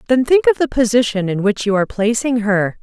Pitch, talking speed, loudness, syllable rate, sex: 225 Hz, 235 wpm, -16 LUFS, 5.7 syllables/s, female